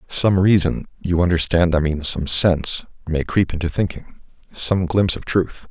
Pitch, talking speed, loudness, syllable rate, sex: 85 Hz, 170 wpm, -19 LUFS, 4.8 syllables/s, male